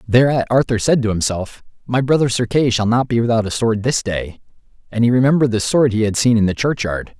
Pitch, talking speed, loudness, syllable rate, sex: 115 Hz, 235 wpm, -17 LUFS, 5.9 syllables/s, male